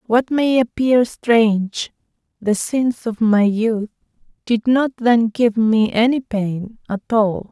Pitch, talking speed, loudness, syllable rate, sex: 225 Hz, 145 wpm, -18 LUFS, 3.4 syllables/s, female